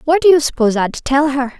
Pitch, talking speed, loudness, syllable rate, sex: 280 Hz, 265 wpm, -14 LUFS, 5.5 syllables/s, female